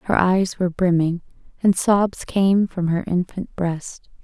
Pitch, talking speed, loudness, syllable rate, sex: 180 Hz, 155 wpm, -20 LUFS, 4.0 syllables/s, female